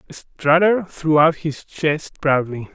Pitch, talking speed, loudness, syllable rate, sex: 155 Hz, 130 wpm, -19 LUFS, 3.3 syllables/s, male